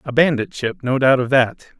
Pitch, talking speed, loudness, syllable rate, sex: 130 Hz, 235 wpm, -18 LUFS, 4.9 syllables/s, male